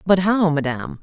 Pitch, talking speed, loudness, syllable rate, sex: 170 Hz, 175 wpm, -19 LUFS, 5.5 syllables/s, female